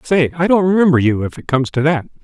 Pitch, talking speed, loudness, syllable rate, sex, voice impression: 150 Hz, 270 wpm, -15 LUFS, 6.6 syllables/s, male, masculine, adult-like, tensed, slightly powerful, slightly hard, clear, cool, intellectual, calm, slightly mature, wild, lively, strict